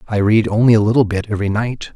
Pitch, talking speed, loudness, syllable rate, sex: 110 Hz, 245 wpm, -15 LUFS, 6.6 syllables/s, male